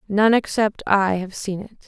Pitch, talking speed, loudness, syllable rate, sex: 205 Hz, 190 wpm, -20 LUFS, 4.6 syllables/s, female